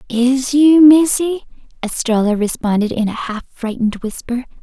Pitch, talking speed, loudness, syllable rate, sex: 250 Hz, 130 wpm, -15 LUFS, 4.6 syllables/s, female